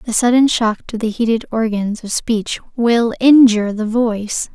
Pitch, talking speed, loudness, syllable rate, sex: 225 Hz, 170 wpm, -16 LUFS, 4.6 syllables/s, female